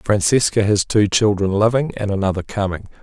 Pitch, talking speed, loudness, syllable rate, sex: 100 Hz, 160 wpm, -18 LUFS, 5.3 syllables/s, male